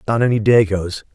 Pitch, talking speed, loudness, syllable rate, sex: 105 Hz, 160 wpm, -16 LUFS, 5.4 syllables/s, male